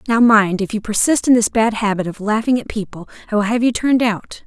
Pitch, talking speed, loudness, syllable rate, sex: 220 Hz, 255 wpm, -17 LUFS, 5.9 syllables/s, female